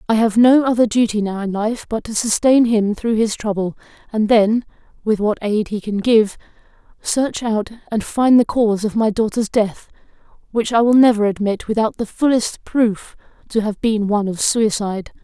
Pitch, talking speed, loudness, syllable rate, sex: 220 Hz, 190 wpm, -17 LUFS, 4.9 syllables/s, female